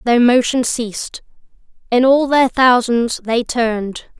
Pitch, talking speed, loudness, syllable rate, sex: 240 Hz, 130 wpm, -15 LUFS, 3.9 syllables/s, female